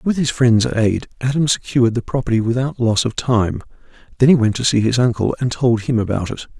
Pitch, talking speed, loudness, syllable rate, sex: 120 Hz, 220 wpm, -17 LUFS, 5.6 syllables/s, male